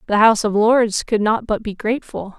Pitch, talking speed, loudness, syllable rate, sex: 215 Hz, 225 wpm, -17 LUFS, 5.4 syllables/s, female